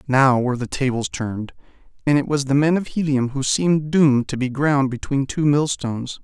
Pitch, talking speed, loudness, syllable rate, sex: 140 Hz, 200 wpm, -20 LUFS, 5.4 syllables/s, male